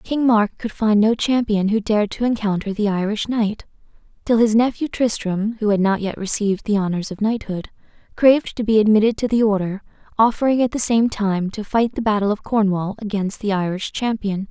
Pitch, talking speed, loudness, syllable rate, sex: 215 Hz, 200 wpm, -19 LUFS, 5.4 syllables/s, female